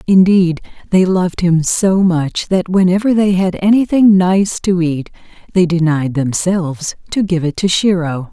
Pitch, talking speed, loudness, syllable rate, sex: 180 Hz, 160 wpm, -14 LUFS, 4.4 syllables/s, female